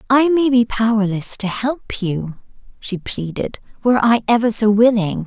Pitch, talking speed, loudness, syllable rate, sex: 220 Hz, 160 wpm, -17 LUFS, 4.6 syllables/s, female